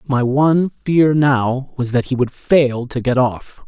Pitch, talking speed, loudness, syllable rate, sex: 130 Hz, 195 wpm, -16 LUFS, 3.7 syllables/s, male